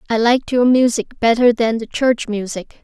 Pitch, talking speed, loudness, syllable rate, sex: 230 Hz, 190 wpm, -16 LUFS, 5.0 syllables/s, female